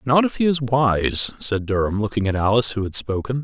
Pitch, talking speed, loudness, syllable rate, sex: 115 Hz, 225 wpm, -20 LUFS, 5.5 syllables/s, male